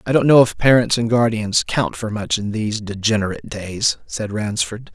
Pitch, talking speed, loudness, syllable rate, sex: 110 Hz, 195 wpm, -18 LUFS, 5.1 syllables/s, male